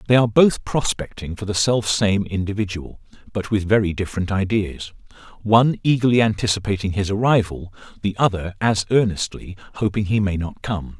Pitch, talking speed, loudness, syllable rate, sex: 100 Hz, 140 wpm, -20 LUFS, 5.7 syllables/s, male